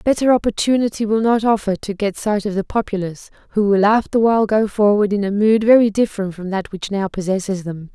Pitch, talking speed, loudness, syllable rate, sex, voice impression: 210 Hz, 205 wpm, -17 LUFS, 5.9 syllables/s, female, feminine, adult-like, slightly relaxed, slightly weak, soft, fluent, calm, elegant, kind, modest